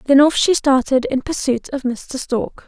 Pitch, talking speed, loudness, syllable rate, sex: 275 Hz, 200 wpm, -18 LUFS, 4.5 syllables/s, female